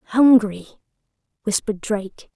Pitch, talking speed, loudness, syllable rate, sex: 215 Hz, 75 wpm, -19 LUFS, 5.5 syllables/s, female